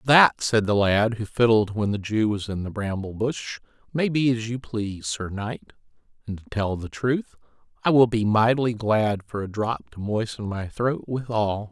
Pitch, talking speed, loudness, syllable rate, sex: 110 Hz, 200 wpm, -24 LUFS, 4.6 syllables/s, male